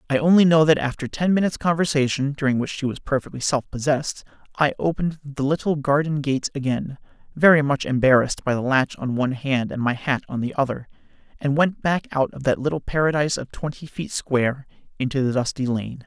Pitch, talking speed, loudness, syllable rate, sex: 140 Hz, 200 wpm, -22 LUFS, 6.0 syllables/s, male